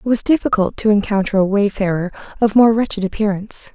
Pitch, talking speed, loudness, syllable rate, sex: 205 Hz, 175 wpm, -16 LUFS, 6.2 syllables/s, female